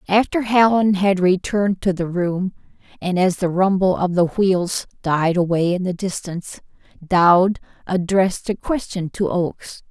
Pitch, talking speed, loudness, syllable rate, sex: 185 Hz, 150 wpm, -19 LUFS, 4.4 syllables/s, female